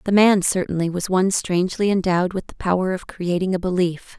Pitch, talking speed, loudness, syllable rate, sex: 185 Hz, 200 wpm, -20 LUFS, 5.9 syllables/s, female